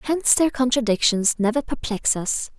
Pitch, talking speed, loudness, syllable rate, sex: 240 Hz, 140 wpm, -21 LUFS, 4.9 syllables/s, female